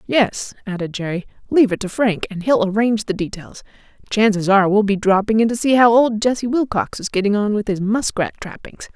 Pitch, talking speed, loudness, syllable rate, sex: 210 Hz, 210 wpm, -18 LUFS, 5.8 syllables/s, female